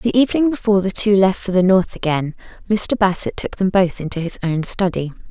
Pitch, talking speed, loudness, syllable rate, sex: 190 Hz, 215 wpm, -18 LUFS, 5.7 syllables/s, female